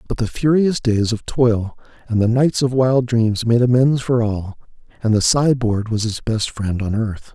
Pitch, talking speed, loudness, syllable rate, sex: 115 Hz, 205 wpm, -18 LUFS, 4.5 syllables/s, male